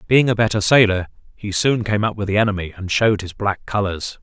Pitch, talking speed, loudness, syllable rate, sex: 105 Hz, 225 wpm, -18 LUFS, 5.8 syllables/s, male